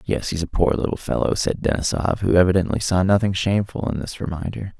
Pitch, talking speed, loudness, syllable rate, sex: 90 Hz, 200 wpm, -21 LUFS, 6.0 syllables/s, male